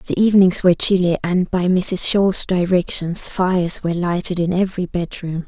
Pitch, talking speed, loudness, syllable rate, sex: 180 Hz, 165 wpm, -18 LUFS, 5.2 syllables/s, female